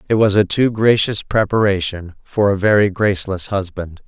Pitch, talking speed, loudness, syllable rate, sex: 100 Hz, 160 wpm, -16 LUFS, 5.0 syllables/s, male